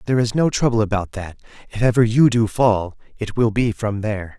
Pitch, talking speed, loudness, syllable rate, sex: 110 Hz, 220 wpm, -19 LUFS, 5.7 syllables/s, male